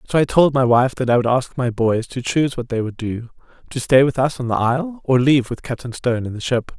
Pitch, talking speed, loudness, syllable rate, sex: 125 Hz, 275 wpm, -19 LUFS, 6.0 syllables/s, male